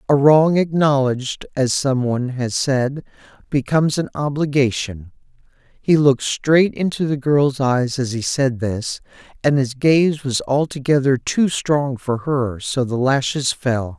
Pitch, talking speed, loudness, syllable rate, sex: 135 Hz, 150 wpm, -18 LUFS, 4.1 syllables/s, male